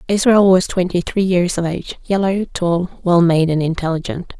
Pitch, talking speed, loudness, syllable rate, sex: 180 Hz, 180 wpm, -16 LUFS, 5.0 syllables/s, female